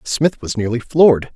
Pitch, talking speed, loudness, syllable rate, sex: 130 Hz, 175 wpm, -16 LUFS, 4.8 syllables/s, male